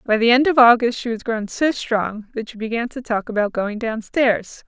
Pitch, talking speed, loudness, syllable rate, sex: 230 Hz, 245 wpm, -19 LUFS, 4.9 syllables/s, female